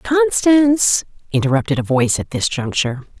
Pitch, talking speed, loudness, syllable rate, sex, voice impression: 165 Hz, 130 wpm, -16 LUFS, 5.4 syllables/s, female, very feminine, very middle-aged, slightly raspy, slightly calm